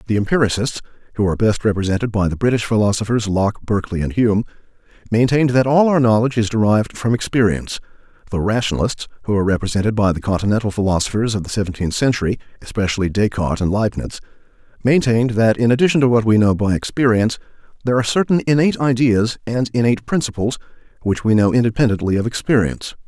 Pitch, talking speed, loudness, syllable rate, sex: 110 Hz, 155 wpm, -18 LUFS, 7.0 syllables/s, male